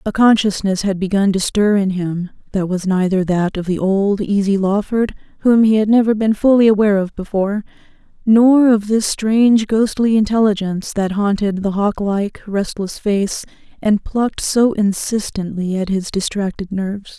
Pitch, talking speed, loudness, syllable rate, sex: 205 Hz, 160 wpm, -16 LUFS, 4.8 syllables/s, female